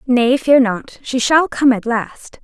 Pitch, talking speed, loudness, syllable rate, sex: 250 Hz, 195 wpm, -15 LUFS, 3.5 syllables/s, female